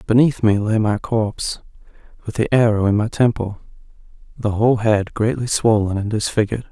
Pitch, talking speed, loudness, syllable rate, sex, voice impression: 110 Hz, 160 wpm, -18 LUFS, 5.5 syllables/s, male, very masculine, adult-like, slightly dark, cool, very calm, slightly sweet, kind